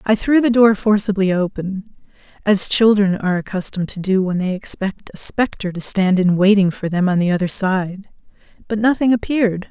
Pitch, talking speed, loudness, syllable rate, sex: 200 Hz, 185 wpm, -17 LUFS, 5.3 syllables/s, female